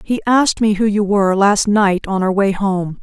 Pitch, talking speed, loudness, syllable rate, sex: 200 Hz, 240 wpm, -15 LUFS, 4.9 syllables/s, female